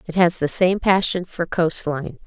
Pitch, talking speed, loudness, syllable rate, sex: 175 Hz, 210 wpm, -20 LUFS, 4.4 syllables/s, female